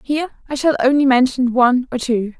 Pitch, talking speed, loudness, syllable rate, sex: 260 Hz, 200 wpm, -16 LUFS, 6.2 syllables/s, female